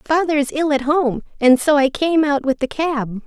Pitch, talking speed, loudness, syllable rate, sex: 285 Hz, 220 wpm, -17 LUFS, 4.3 syllables/s, female